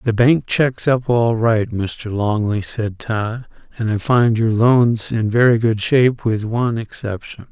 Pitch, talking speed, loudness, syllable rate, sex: 115 Hz, 170 wpm, -17 LUFS, 3.9 syllables/s, male